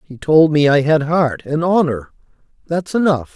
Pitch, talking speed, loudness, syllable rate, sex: 155 Hz, 160 wpm, -15 LUFS, 4.6 syllables/s, male